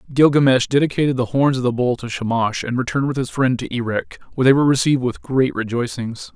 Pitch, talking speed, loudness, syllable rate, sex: 125 Hz, 215 wpm, -19 LUFS, 6.5 syllables/s, male